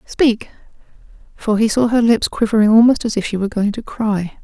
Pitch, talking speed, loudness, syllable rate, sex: 220 Hz, 205 wpm, -16 LUFS, 5.5 syllables/s, female